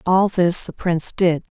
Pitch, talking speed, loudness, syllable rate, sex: 175 Hz, 190 wpm, -18 LUFS, 4.3 syllables/s, female